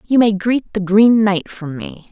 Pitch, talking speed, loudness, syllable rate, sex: 205 Hz, 225 wpm, -15 LUFS, 4.0 syllables/s, female